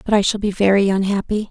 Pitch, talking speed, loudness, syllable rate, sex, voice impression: 200 Hz, 240 wpm, -17 LUFS, 6.4 syllables/s, female, very feminine, middle-aged, thin, relaxed, weak, slightly dark, soft, slightly clear, fluent, cute, slightly cool, intellectual, slightly refreshing, sincere, slightly calm, slightly friendly, reassuring, elegant, slightly sweet, kind, very modest